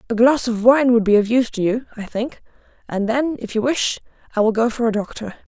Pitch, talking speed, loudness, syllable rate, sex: 230 Hz, 250 wpm, -19 LUFS, 5.8 syllables/s, female